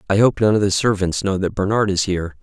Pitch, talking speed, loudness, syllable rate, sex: 100 Hz, 275 wpm, -18 LUFS, 6.4 syllables/s, male